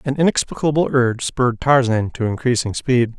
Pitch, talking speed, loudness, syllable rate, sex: 125 Hz, 150 wpm, -18 LUFS, 5.6 syllables/s, male